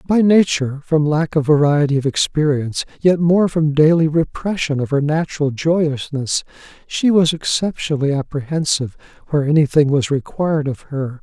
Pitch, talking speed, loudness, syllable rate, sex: 150 Hz, 145 wpm, -17 LUFS, 5.2 syllables/s, male